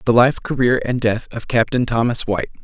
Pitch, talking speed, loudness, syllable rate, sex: 120 Hz, 205 wpm, -18 LUFS, 5.8 syllables/s, male